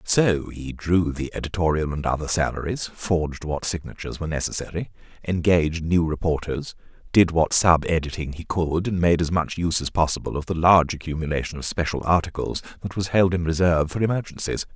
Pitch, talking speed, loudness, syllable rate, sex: 85 Hz, 175 wpm, -23 LUFS, 5.8 syllables/s, male